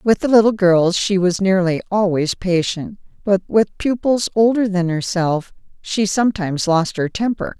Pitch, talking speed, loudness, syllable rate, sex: 195 Hz, 160 wpm, -17 LUFS, 4.5 syllables/s, female